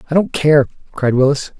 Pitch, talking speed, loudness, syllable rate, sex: 145 Hz, 190 wpm, -15 LUFS, 5.4 syllables/s, male